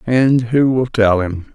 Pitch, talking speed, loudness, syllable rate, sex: 115 Hz, 195 wpm, -15 LUFS, 3.5 syllables/s, male